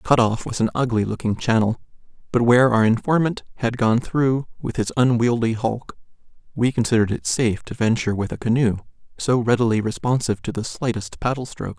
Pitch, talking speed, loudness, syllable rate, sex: 120 Hz, 180 wpm, -21 LUFS, 6.0 syllables/s, male